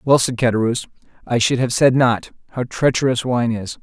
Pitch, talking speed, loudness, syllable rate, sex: 120 Hz, 175 wpm, -18 LUFS, 5.4 syllables/s, male